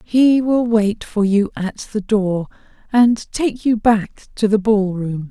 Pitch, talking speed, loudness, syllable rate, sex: 215 Hz, 180 wpm, -17 LUFS, 3.5 syllables/s, female